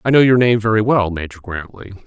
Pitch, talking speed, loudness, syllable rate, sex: 105 Hz, 230 wpm, -15 LUFS, 5.6 syllables/s, male